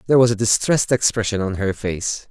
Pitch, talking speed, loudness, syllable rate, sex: 105 Hz, 210 wpm, -19 LUFS, 6.1 syllables/s, male